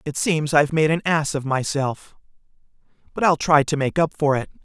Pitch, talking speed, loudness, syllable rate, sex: 150 Hz, 205 wpm, -20 LUFS, 5.3 syllables/s, male